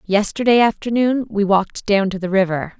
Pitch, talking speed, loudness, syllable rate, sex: 205 Hz, 170 wpm, -17 LUFS, 5.3 syllables/s, female